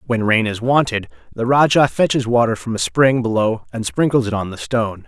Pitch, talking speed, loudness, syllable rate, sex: 120 Hz, 215 wpm, -17 LUFS, 5.5 syllables/s, male